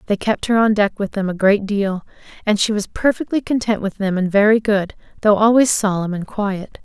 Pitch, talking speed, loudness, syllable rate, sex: 210 Hz, 220 wpm, -18 LUFS, 5.2 syllables/s, female